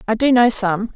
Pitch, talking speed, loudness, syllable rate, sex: 225 Hz, 250 wpm, -16 LUFS, 5.2 syllables/s, female